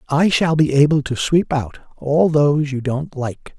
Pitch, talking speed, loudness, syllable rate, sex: 145 Hz, 200 wpm, -17 LUFS, 4.3 syllables/s, male